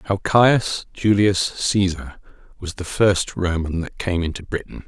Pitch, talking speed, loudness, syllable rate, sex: 95 Hz, 150 wpm, -20 LUFS, 4.1 syllables/s, male